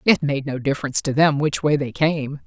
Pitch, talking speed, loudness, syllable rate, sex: 135 Hz, 245 wpm, -20 LUFS, 5.5 syllables/s, female